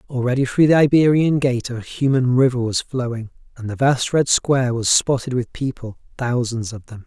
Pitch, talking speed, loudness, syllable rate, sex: 125 Hz, 185 wpm, -18 LUFS, 5.1 syllables/s, male